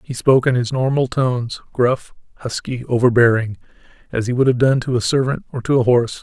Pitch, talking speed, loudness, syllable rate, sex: 125 Hz, 200 wpm, -18 LUFS, 5.9 syllables/s, male